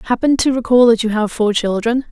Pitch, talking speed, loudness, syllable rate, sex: 230 Hz, 225 wpm, -15 LUFS, 5.9 syllables/s, female